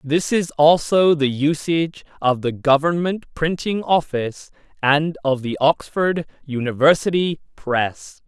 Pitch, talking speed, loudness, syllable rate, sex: 150 Hz, 115 wpm, -19 LUFS, 4.0 syllables/s, male